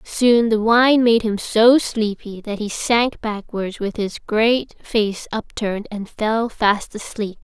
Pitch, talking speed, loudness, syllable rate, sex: 220 Hz, 160 wpm, -19 LUFS, 3.5 syllables/s, female